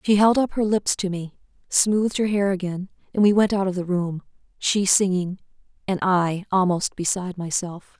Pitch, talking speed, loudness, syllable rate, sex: 190 Hz, 190 wpm, -22 LUFS, 5.0 syllables/s, female